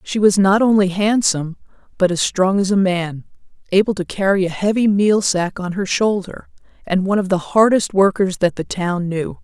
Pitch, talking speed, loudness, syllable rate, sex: 190 Hz, 195 wpm, -17 LUFS, 5.1 syllables/s, female